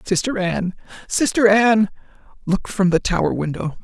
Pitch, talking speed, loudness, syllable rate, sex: 180 Hz, 140 wpm, -19 LUFS, 5.3 syllables/s, male